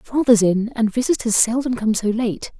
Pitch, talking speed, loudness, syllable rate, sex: 230 Hz, 185 wpm, -18 LUFS, 4.8 syllables/s, female